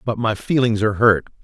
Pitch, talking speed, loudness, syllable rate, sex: 110 Hz, 210 wpm, -18 LUFS, 5.8 syllables/s, male